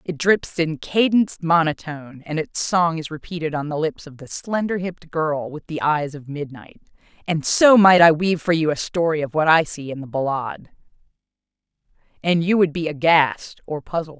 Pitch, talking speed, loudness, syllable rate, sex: 160 Hz, 190 wpm, -20 LUFS, 5.1 syllables/s, female